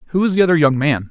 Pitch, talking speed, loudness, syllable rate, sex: 155 Hz, 325 wpm, -15 LUFS, 8.4 syllables/s, male